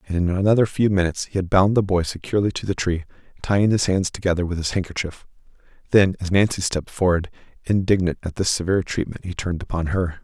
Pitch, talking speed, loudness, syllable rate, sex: 90 Hz, 205 wpm, -21 LUFS, 6.7 syllables/s, male